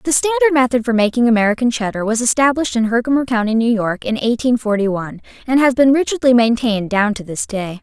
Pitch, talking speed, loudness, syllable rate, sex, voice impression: 235 Hz, 205 wpm, -16 LUFS, 6.2 syllables/s, female, feminine, slightly young, tensed, powerful, bright, slightly soft, clear, fluent, slightly cute, intellectual, calm, friendly, lively